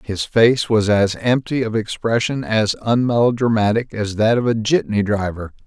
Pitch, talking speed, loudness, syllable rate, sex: 110 Hz, 160 wpm, -18 LUFS, 4.7 syllables/s, male